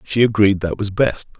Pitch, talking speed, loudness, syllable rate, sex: 105 Hz, 215 wpm, -17 LUFS, 5.0 syllables/s, male